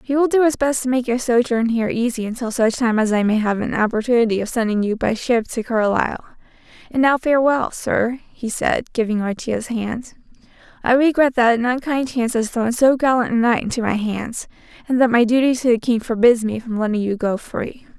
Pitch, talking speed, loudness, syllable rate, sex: 235 Hz, 220 wpm, -19 LUFS, 5.6 syllables/s, female